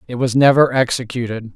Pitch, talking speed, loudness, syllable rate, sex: 125 Hz, 155 wpm, -16 LUFS, 5.8 syllables/s, male